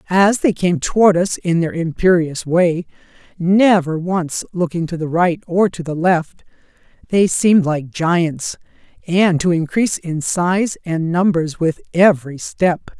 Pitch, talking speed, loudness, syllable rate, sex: 175 Hz, 150 wpm, -17 LUFS, 4.1 syllables/s, female